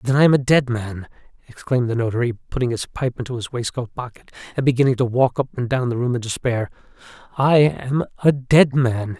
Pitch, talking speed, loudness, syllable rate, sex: 125 Hz, 210 wpm, -20 LUFS, 5.9 syllables/s, male